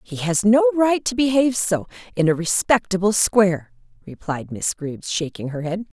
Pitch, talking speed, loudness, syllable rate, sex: 190 Hz, 170 wpm, -20 LUFS, 5.0 syllables/s, female